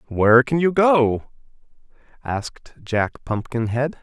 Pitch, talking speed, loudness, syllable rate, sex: 130 Hz, 105 wpm, -20 LUFS, 4.2 syllables/s, male